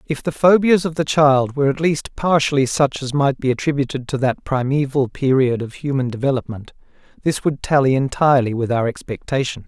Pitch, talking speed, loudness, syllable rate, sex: 135 Hz, 180 wpm, -18 LUFS, 5.5 syllables/s, male